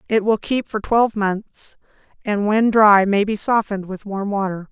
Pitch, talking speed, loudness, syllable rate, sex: 205 Hz, 190 wpm, -18 LUFS, 4.7 syllables/s, female